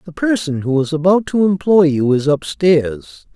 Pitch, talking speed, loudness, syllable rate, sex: 165 Hz, 195 wpm, -15 LUFS, 4.4 syllables/s, male